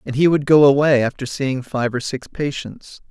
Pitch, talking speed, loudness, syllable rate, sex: 135 Hz, 210 wpm, -18 LUFS, 4.8 syllables/s, male